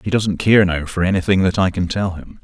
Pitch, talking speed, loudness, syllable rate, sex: 95 Hz, 270 wpm, -17 LUFS, 5.6 syllables/s, male